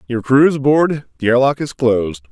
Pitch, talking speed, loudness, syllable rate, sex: 130 Hz, 235 wpm, -15 LUFS, 5.6 syllables/s, male